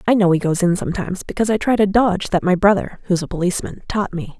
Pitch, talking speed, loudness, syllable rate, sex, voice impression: 190 Hz, 230 wpm, -18 LUFS, 7.1 syllables/s, female, very feminine, slightly young, adult-like, thin, tensed, slightly powerful, very bright, soft, very clear, fluent, cute, intellectual, very refreshing, sincere, calm, friendly, very reassuring, unique, very elegant, very sweet, slightly lively, very kind, modest, light